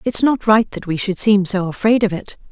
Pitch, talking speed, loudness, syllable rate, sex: 205 Hz, 260 wpm, -17 LUFS, 5.2 syllables/s, female